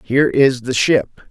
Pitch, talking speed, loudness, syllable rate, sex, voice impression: 130 Hz, 185 wpm, -15 LUFS, 5.0 syllables/s, male, masculine, adult-like, thick, tensed, powerful, slightly hard, slightly muffled, cool, intellectual, mature, friendly, wild, lively, slightly intense